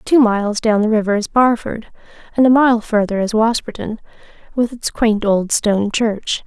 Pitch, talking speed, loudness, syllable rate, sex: 220 Hz, 175 wpm, -16 LUFS, 4.9 syllables/s, female